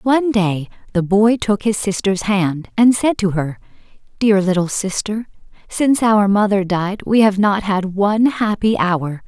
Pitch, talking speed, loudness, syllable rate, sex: 200 Hz, 170 wpm, -17 LUFS, 4.3 syllables/s, female